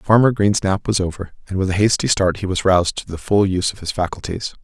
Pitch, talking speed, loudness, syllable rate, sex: 95 Hz, 260 wpm, -19 LUFS, 6.1 syllables/s, male